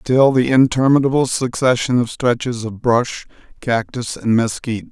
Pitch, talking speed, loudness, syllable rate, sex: 125 Hz, 135 wpm, -17 LUFS, 4.7 syllables/s, male